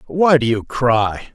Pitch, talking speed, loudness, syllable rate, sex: 130 Hz, 180 wpm, -16 LUFS, 3.7 syllables/s, male